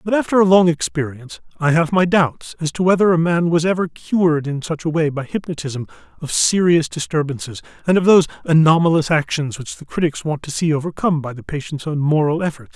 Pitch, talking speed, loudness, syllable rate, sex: 160 Hz, 205 wpm, -18 LUFS, 5.9 syllables/s, male